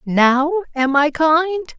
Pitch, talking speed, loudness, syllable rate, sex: 305 Hz, 135 wpm, -16 LUFS, 2.9 syllables/s, female